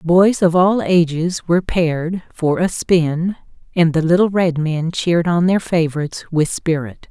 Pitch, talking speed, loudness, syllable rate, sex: 170 Hz, 170 wpm, -17 LUFS, 4.5 syllables/s, female